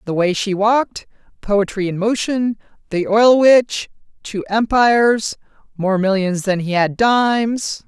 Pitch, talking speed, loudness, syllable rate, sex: 210 Hz, 135 wpm, -16 LUFS, 4.0 syllables/s, female